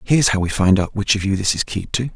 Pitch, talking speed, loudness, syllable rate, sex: 100 Hz, 335 wpm, -18 LUFS, 6.4 syllables/s, male